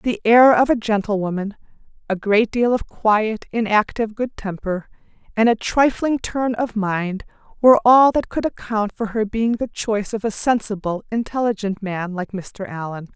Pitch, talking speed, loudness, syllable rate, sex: 215 Hz, 170 wpm, -19 LUFS, 4.7 syllables/s, female